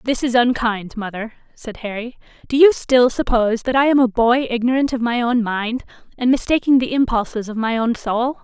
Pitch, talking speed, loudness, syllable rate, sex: 240 Hz, 200 wpm, -18 LUFS, 5.2 syllables/s, female